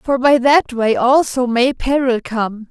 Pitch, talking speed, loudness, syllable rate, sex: 255 Hz, 175 wpm, -15 LUFS, 3.8 syllables/s, female